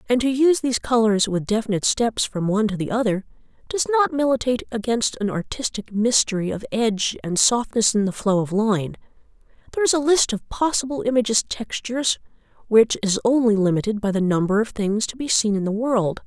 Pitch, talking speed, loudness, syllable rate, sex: 225 Hz, 190 wpm, -21 LUFS, 5.8 syllables/s, female